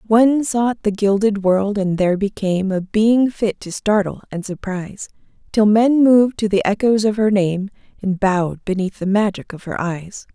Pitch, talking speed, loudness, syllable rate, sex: 200 Hz, 185 wpm, -18 LUFS, 4.9 syllables/s, female